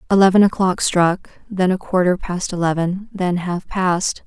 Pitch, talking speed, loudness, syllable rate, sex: 185 Hz, 155 wpm, -18 LUFS, 4.4 syllables/s, female